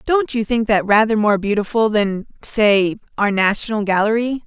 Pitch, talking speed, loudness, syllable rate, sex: 215 Hz, 135 wpm, -17 LUFS, 4.8 syllables/s, female